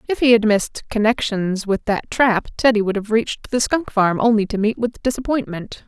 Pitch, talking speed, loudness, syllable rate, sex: 220 Hz, 205 wpm, -19 LUFS, 5.2 syllables/s, female